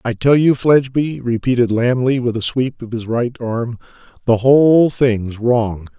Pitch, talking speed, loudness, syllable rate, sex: 120 Hz, 170 wpm, -16 LUFS, 4.4 syllables/s, male